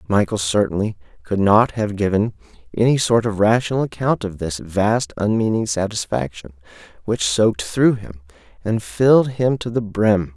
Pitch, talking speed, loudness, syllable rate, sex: 105 Hz, 150 wpm, -19 LUFS, 4.8 syllables/s, male